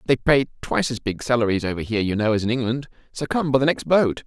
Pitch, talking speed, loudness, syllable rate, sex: 125 Hz, 270 wpm, -22 LUFS, 6.7 syllables/s, male